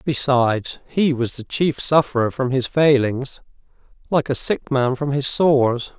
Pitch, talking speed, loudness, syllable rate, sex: 135 Hz, 160 wpm, -19 LUFS, 4.3 syllables/s, male